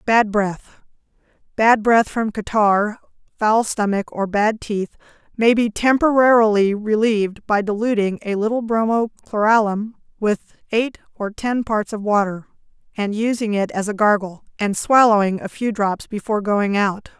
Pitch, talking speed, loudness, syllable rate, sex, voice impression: 215 Hz, 145 wpm, -19 LUFS, 4.6 syllables/s, female, feminine, adult-like, tensed, powerful, clear, slightly nasal, slightly intellectual, friendly, reassuring, slightly lively, strict, slightly sharp